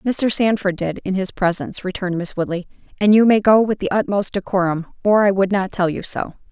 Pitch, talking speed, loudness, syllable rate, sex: 195 Hz, 220 wpm, -18 LUFS, 5.7 syllables/s, female